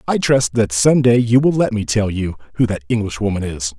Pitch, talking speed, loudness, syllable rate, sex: 105 Hz, 240 wpm, -17 LUFS, 5.3 syllables/s, male